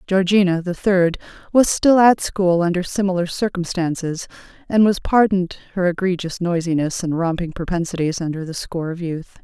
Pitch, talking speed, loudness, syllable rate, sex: 180 Hz, 155 wpm, -19 LUFS, 5.4 syllables/s, female